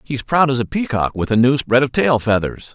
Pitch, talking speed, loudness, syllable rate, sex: 125 Hz, 265 wpm, -17 LUFS, 5.3 syllables/s, male